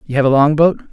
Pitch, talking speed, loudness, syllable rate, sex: 145 Hz, 260 wpm, -13 LUFS, 6.9 syllables/s, male